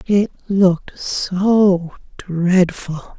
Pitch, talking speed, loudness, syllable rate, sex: 185 Hz, 75 wpm, -17 LUFS, 2.2 syllables/s, female